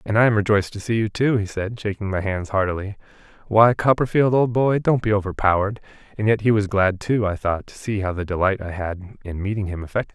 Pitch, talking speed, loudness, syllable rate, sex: 105 Hz, 240 wpm, -21 LUFS, 6.2 syllables/s, male